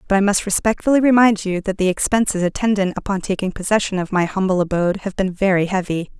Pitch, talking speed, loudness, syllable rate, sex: 195 Hz, 205 wpm, -18 LUFS, 6.4 syllables/s, female